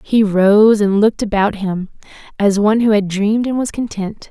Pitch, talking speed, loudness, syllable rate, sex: 210 Hz, 195 wpm, -15 LUFS, 5.1 syllables/s, female